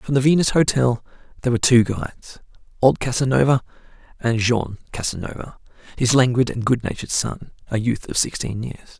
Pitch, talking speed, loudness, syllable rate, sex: 125 Hz, 155 wpm, -20 LUFS, 5.7 syllables/s, male